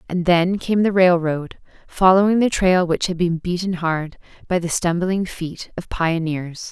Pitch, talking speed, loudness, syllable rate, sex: 175 Hz, 170 wpm, -19 LUFS, 4.2 syllables/s, female